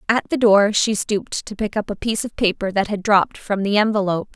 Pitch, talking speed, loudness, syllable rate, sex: 205 Hz, 250 wpm, -19 LUFS, 6.1 syllables/s, female